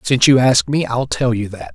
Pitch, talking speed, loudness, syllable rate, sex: 125 Hz, 275 wpm, -15 LUFS, 5.5 syllables/s, male